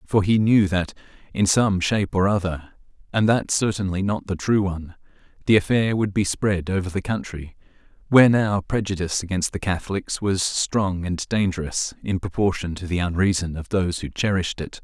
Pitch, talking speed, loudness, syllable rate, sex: 95 Hz, 180 wpm, -22 LUFS, 5.3 syllables/s, male